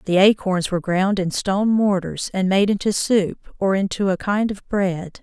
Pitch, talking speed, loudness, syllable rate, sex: 195 Hz, 195 wpm, -20 LUFS, 4.7 syllables/s, female